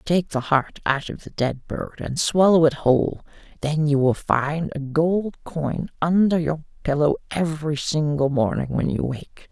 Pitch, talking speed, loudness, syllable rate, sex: 150 Hz, 175 wpm, -22 LUFS, 4.3 syllables/s, male